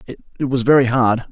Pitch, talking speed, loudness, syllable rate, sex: 125 Hz, 180 wpm, -16 LUFS, 5.3 syllables/s, male